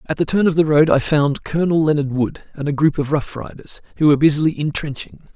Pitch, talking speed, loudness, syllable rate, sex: 150 Hz, 235 wpm, -17 LUFS, 6.1 syllables/s, male